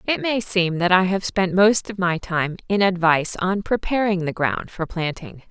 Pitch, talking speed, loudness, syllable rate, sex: 185 Hz, 205 wpm, -20 LUFS, 4.6 syllables/s, female